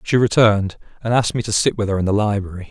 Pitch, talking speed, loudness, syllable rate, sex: 105 Hz, 265 wpm, -18 LUFS, 7.1 syllables/s, male